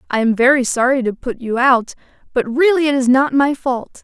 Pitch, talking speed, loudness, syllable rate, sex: 260 Hz, 225 wpm, -16 LUFS, 5.3 syllables/s, female